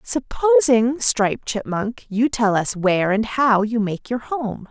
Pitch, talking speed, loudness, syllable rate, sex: 220 Hz, 165 wpm, -19 LUFS, 3.9 syllables/s, female